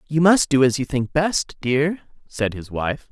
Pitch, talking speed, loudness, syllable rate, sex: 140 Hz, 210 wpm, -20 LUFS, 4.0 syllables/s, male